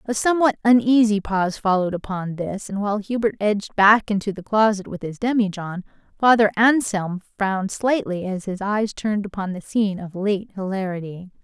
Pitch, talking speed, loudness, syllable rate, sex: 205 Hz, 170 wpm, -21 LUFS, 5.4 syllables/s, female